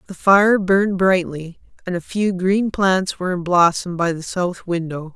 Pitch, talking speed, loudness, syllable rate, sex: 180 Hz, 185 wpm, -18 LUFS, 4.5 syllables/s, female